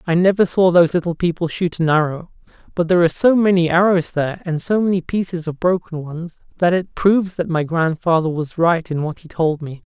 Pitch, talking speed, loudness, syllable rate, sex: 170 Hz, 220 wpm, -18 LUFS, 5.8 syllables/s, male